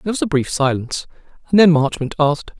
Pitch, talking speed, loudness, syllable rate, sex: 160 Hz, 210 wpm, -17 LUFS, 6.9 syllables/s, male